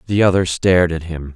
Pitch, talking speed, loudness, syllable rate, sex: 85 Hz, 220 wpm, -16 LUFS, 6.0 syllables/s, male